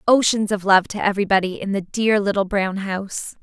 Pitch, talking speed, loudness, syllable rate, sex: 200 Hz, 195 wpm, -20 LUFS, 5.6 syllables/s, female